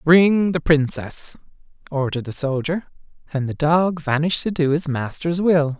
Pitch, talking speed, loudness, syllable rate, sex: 155 Hz, 155 wpm, -20 LUFS, 4.6 syllables/s, male